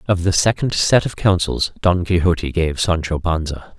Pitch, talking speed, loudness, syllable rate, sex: 90 Hz, 175 wpm, -18 LUFS, 4.8 syllables/s, male